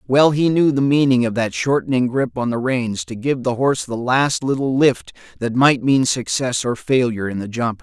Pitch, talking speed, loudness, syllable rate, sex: 125 Hz, 220 wpm, -18 LUFS, 4.9 syllables/s, male